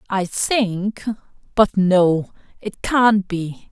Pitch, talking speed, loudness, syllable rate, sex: 200 Hz, 95 wpm, -19 LUFS, 2.6 syllables/s, female